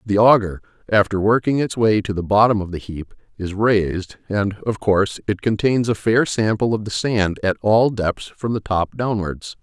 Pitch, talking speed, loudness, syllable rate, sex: 105 Hz, 200 wpm, -19 LUFS, 4.7 syllables/s, male